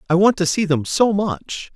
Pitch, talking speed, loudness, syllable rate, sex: 180 Hz, 240 wpm, -18 LUFS, 4.5 syllables/s, male